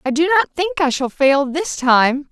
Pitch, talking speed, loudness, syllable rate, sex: 300 Hz, 235 wpm, -16 LUFS, 4.1 syllables/s, female